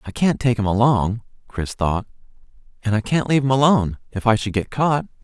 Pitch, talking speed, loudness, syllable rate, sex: 115 Hz, 205 wpm, -20 LUFS, 5.8 syllables/s, male